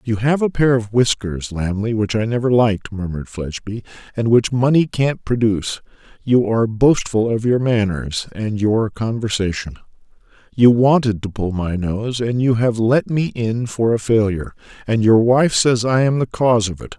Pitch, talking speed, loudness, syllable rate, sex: 115 Hz, 185 wpm, -18 LUFS, 4.9 syllables/s, male